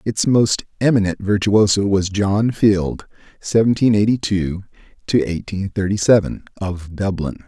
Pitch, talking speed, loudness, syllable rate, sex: 100 Hz, 130 wpm, -18 LUFS, 3.9 syllables/s, male